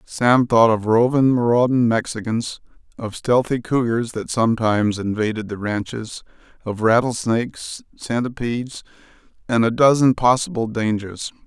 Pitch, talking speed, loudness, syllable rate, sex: 115 Hz, 115 wpm, -19 LUFS, 4.6 syllables/s, male